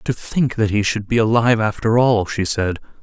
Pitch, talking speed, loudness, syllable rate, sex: 110 Hz, 220 wpm, -18 LUFS, 5.2 syllables/s, male